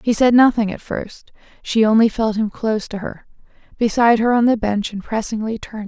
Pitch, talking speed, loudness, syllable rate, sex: 220 Hz, 215 wpm, -18 LUFS, 6.0 syllables/s, female